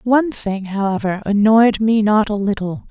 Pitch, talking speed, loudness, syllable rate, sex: 210 Hz, 165 wpm, -16 LUFS, 4.7 syllables/s, female